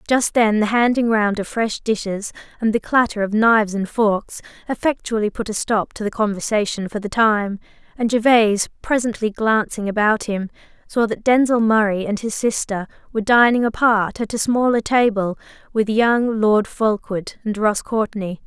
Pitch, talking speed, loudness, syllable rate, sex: 220 Hz, 170 wpm, -19 LUFS, 4.9 syllables/s, female